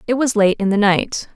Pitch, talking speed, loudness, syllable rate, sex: 215 Hz, 265 wpm, -17 LUFS, 5.2 syllables/s, female